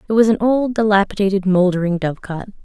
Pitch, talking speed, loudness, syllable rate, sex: 200 Hz, 160 wpm, -16 LUFS, 6.5 syllables/s, female